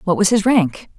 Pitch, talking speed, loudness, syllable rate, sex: 195 Hz, 245 wpm, -16 LUFS, 5.0 syllables/s, female